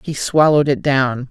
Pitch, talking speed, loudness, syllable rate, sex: 140 Hz, 185 wpm, -15 LUFS, 5.0 syllables/s, female